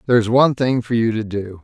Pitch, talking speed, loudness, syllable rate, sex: 115 Hz, 295 wpm, -18 LUFS, 6.8 syllables/s, male